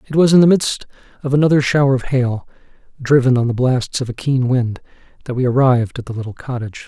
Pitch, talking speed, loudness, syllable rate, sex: 130 Hz, 220 wpm, -16 LUFS, 6.3 syllables/s, male